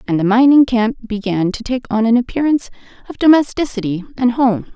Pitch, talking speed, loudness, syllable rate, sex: 235 Hz, 175 wpm, -15 LUFS, 5.8 syllables/s, female